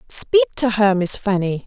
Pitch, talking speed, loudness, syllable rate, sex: 220 Hz, 180 wpm, -17 LUFS, 4.4 syllables/s, female